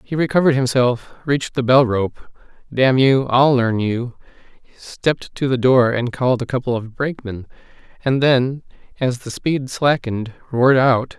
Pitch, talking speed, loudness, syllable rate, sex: 125 Hz, 160 wpm, -18 LUFS, 4.9 syllables/s, male